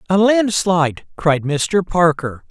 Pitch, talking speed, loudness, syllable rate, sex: 175 Hz, 120 wpm, -17 LUFS, 3.7 syllables/s, male